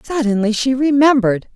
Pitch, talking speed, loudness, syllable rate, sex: 250 Hz, 115 wpm, -15 LUFS, 5.6 syllables/s, female